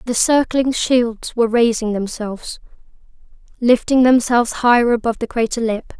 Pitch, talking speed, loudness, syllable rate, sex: 235 Hz, 130 wpm, -17 LUFS, 5.2 syllables/s, female